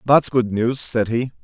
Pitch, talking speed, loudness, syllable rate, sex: 120 Hz, 210 wpm, -19 LUFS, 4.3 syllables/s, male